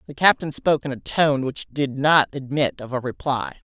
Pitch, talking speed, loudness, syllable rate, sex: 140 Hz, 210 wpm, -22 LUFS, 5.0 syllables/s, female